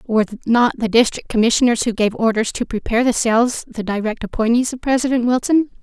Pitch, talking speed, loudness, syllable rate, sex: 235 Hz, 185 wpm, -17 LUFS, 6.1 syllables/s, female